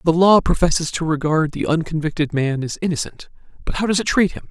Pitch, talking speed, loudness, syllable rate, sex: 160 Hz, 215 wpm, -19 LUFS, 6.0 syllables/s, male